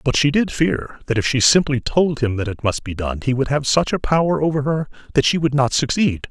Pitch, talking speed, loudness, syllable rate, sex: 135 Hz, 265 wpm, -19 LUFS, 5.5 syllables/s, male